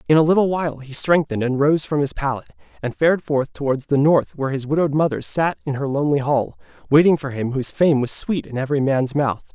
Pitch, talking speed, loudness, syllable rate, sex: 145 Hz, 235 wpm, -20 LUFS, 6.3 syllables/s, male